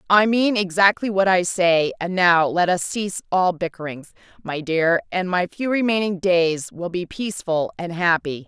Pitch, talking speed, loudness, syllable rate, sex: 180 Hz, 175 wpm, -20 LUFS, 4.6 syllables/s, female